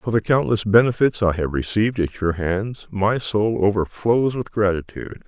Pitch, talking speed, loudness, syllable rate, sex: 105 Hz, 170 wpm, -20 LUFS, 4.8 syllables/s, male